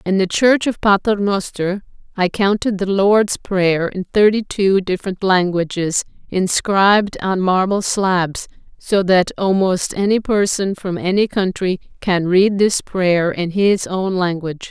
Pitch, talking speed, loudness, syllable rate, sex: 190 Hz, 145 wpm, -17 LUFS, 4.0 syllables/s, female